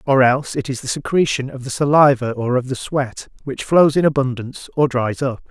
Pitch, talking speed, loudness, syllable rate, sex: 135 Hz, 220 wpm, -18 LUFS, 5.5 syllables/s, male